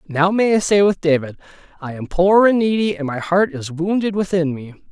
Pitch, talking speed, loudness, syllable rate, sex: 175 Hz, 220 wpm, -17 LUFS, 5.1 syllables/s, male